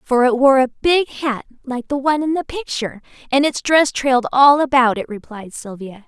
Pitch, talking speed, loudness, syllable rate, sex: 260 Hz, 205 wpm, -16 LUFS, 5.3 syllables/s, female